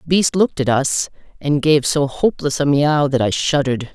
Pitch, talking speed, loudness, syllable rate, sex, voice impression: 145 Hz, 215 wpm, -17 LUFS, 5.4 syllables/s, female, feminine, slightly middle-aged, intellectual, elegant, slightly strict